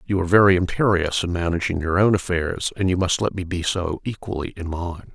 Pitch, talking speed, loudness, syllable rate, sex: 90 Hz, 220 wpm, -21 LUFS, 5.8 syllables/s, male